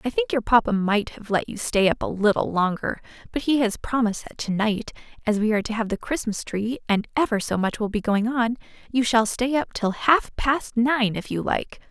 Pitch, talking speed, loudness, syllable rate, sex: 230 Hz, 220 wpm, -23 LUFS, 5.2 syllables/s, female